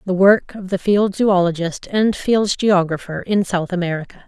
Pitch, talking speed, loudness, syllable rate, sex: 190 Hz, 170 wpm, -18 LUFS, 4.6 syllables/s, female